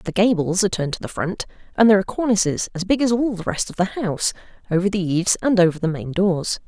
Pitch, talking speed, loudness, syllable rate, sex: 190 Hz, 250 wpm, -20 LUFS, 6.6 syllables/s, female